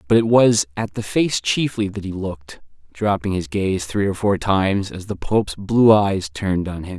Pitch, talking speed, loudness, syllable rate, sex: 100 Hz, 215 wpm, -19 LUFS, 4.8 syllables/s, male